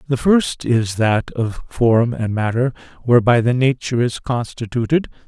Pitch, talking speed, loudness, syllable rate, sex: 120 Hz, 150 wpm, -18 LUFS, 4.6 syllables/s, male